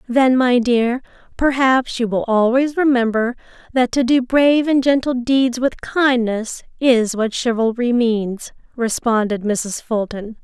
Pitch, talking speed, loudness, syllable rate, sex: 245 Hz, 140 wpm, -17 LUFS, 4.0 syllables/s, female